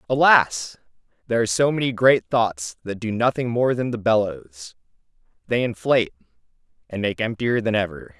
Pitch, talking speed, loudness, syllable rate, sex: 110 Hz, 155 wpm, -21 LUFS, 5.2 syllables/s, male